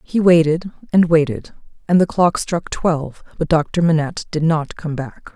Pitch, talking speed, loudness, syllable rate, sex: 160 Hz, 180 wpm, -18 LUFS, 4.9 syllables/s, female